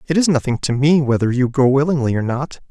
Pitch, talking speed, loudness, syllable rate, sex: 135 Hz, 245 wpm, -17 LUFS, 6.0 syllables/s, male